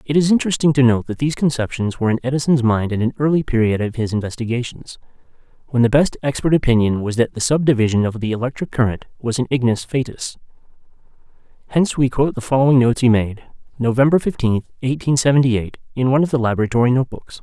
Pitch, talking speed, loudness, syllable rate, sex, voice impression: 125 Hz, 195 wpm, -18 LUFS, 6.8 syllables/s, male, masculine, adult-like, relaxed, slightly dark, fluent, slightly raspy, cool, intellectual, calm, slightly reassuring, wild, slightly modest